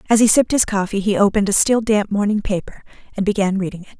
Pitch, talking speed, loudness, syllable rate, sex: 205 Hz, 240 wpm, -17 LUFS, 7.1 syllables/s, female